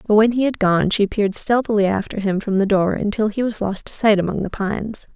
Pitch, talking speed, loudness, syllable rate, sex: 210 Hz, 255 wpm, -19 LUFS, 5.8 syllables/s, female